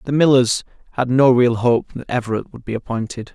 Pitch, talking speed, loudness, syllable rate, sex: 120 Hz, 200 wpm, -18 LUFS, 5.6 syllables/s, male